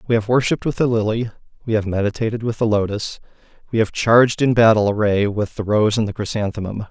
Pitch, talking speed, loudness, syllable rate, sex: 110 Hz, 210 wpm, -19 LUFS, 6.2 syllables/s, male